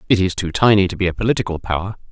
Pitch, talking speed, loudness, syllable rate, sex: 95 Hz, 255 wpm, -18 LUFS, 7.7 syllables/s, male